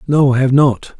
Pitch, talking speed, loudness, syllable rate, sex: 135 Hz, 240 wpm, -13 LUFS, 4.7 syllables/s, male